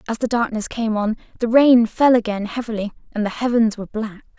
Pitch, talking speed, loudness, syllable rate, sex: 225 Hz, 205 wpm, -19 LUFS, 5.9 syllables/s, female